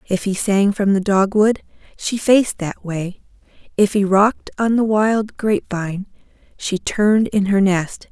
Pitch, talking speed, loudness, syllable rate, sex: 200 Hz, 170 wpm, -18 LUFS, 4.3 syllables/s, female